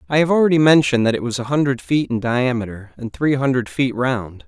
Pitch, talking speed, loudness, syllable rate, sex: 130 Hz, 230 wpm, -18 LUFS, 5.9 syllables/s, male